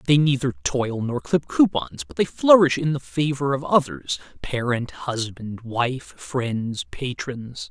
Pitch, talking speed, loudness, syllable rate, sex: 125 Hz, 140 wpm, -23 LUFS, 3.8 syllables/s, male